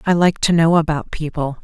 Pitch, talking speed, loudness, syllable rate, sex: 160 Hz, 220 wpm, -17 LUFS, 5.4 syllables/s, female